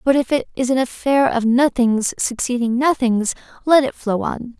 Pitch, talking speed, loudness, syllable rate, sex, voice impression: 250 Hz, 185 wpm, -18 LUFS, 4.7 syllables/s, female, feminine, young, slightly bright, slightly clear, cute, friendly, slightly lively